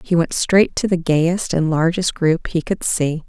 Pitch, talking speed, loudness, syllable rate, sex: 170 Hz, 220 wpm, -18 LUFS, 4.1 syllables/s, female